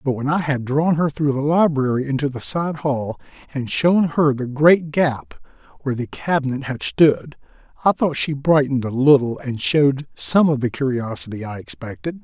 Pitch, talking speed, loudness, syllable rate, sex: 140 Hz, 185 wpm, -19 LUFS, 4.9 syllables/s, male